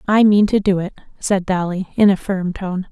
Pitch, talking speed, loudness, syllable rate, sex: 190 Hz, 225 wpm, -17 LUFS, 4.9 syllables/s, female